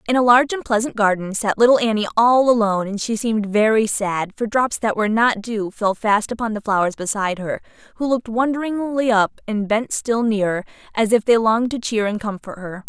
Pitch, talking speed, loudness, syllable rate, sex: 220 Hz, 215 wpm, -19 LUFS, 5.7 syllables/s, female